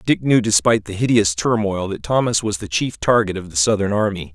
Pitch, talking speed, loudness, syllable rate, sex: 105 Hz, 220 wpm, -18 LUFS, 5.7 syllables/s, male